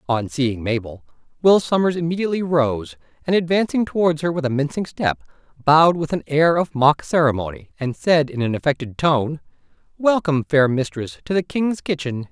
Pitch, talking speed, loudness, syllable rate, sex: 150 Hz, 170 wpm, -20 LUFS, 5.5 syllables/s, male